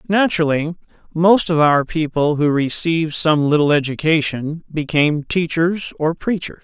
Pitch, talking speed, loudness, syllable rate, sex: 160 Hz, 125 wpm, -17 LUFS, 4.8 syllables/s, male